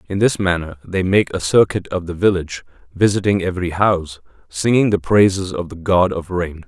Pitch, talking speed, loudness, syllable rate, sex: 90 Hz, 190 wpm, -18 LUFS, 5.5 syllables/s, male